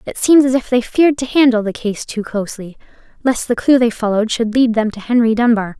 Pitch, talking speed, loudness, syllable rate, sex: 235 Hz, 240 wpm, -15 LUFS, 6.0 syllables/s, female